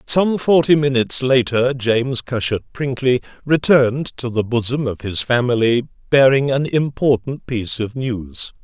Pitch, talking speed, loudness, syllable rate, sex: 125 Hz, 140 wpm, -18 LUFS, 4.6 syllables/s, male